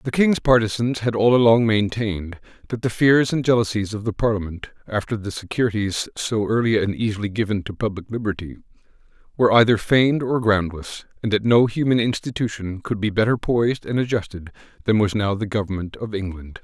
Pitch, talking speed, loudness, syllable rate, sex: 110 Hz, 175 wpm, -21 LUFS, 5.7 syllables/s, male